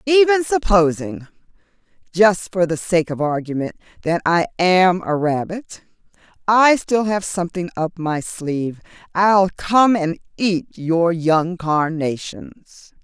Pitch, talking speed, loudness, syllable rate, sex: 180 Hz, 115 wpm, -18 LUFS, 3.7 syllables/s, female